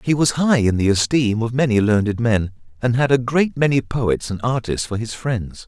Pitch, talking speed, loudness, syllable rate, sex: 120 Hz, 220 wpm, -19 LUFS, 5.0 syllables/s, male